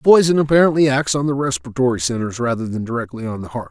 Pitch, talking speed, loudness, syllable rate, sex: 130 Hz, 225 wpm, -18 LUFS, 7.1 syllables/s, male